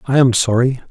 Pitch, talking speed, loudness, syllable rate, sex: 125 Hz, 200 wpm, -15 LUFS, 5.5 syllables/s, male